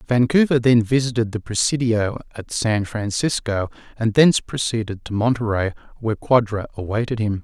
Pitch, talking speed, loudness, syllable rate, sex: 115 Hz, 135 wpm, -20 LUFS, 5.2 syllables/s, male